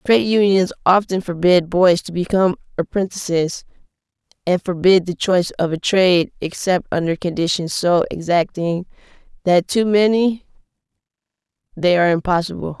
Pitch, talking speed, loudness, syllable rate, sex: 180 Hz, 120 wpm, -18 LUFS, 5.2 syllables/s, female